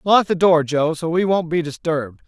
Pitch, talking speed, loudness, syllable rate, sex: 165 Hz, 235 wpm, -19 LUFS, 5.2 syllables/s, male